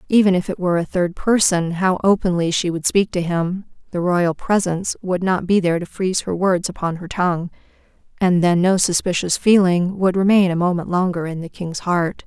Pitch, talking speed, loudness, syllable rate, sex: 180 Hz, 205 wpm, -19 LUFS, 5.3 syllables/s, female